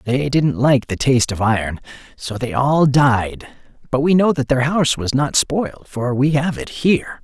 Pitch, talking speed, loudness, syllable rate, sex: 130 Hz, 205 wpm, -17 LUFS, 4.7 syllables/s, male